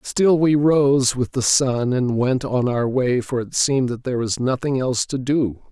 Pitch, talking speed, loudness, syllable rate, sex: 130 Hz, 220 wpm, -19 LUFS, 4.5 syllables/s, male